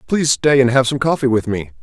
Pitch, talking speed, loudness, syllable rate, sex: 130 Hz, 260 wpm, -16 LUFS, 6.3 syllables/s, male